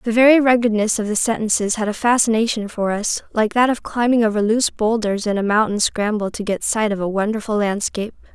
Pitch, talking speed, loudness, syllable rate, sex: 220 Hz, 210 wpm, -18 LUFS, 5.9 syllables/s, female